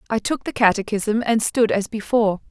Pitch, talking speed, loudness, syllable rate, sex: 220 Hz, 190 wpm, -20 LUFS, 5.3 syllables/s, female